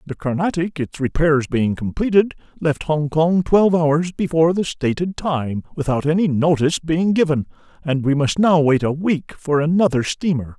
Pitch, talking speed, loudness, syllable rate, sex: 155 Hz, 170 wpm, -19 LUFS, 4.9 syllables/s, male